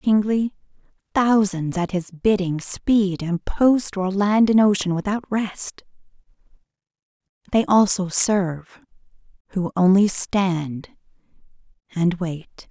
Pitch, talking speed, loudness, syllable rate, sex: 195 Hz, 110 wpm, -20 LUFS, 3.7 syllables/s, female